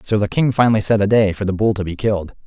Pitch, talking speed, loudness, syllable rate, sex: 100 Hz, 315 wpm, -17 LUFS, 7.0 syllables/s, male